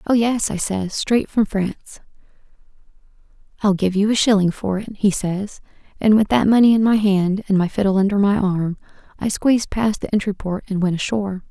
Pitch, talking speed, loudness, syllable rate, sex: 200 Hz, 200 wpm, -19 LUFS, 5.4 syllables/s, female